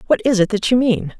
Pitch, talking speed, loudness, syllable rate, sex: 215 Hz, 300 wpm, -16 LUFS, 5.9 syllables/s, female